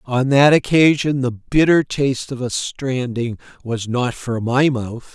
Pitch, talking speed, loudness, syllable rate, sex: 130 Hz, 165 wpm, -18 LUFS, 4.0 syllables/s, male